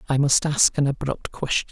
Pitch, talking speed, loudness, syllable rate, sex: 135 Hz, 210 wpm, -21 LUFS, 5.2 syllables/s, male